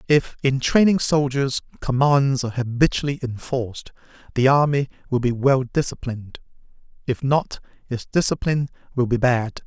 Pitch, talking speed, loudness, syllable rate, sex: 130 Hz, 130 wpm, -21 LUFS, 5.0 syllables/s, male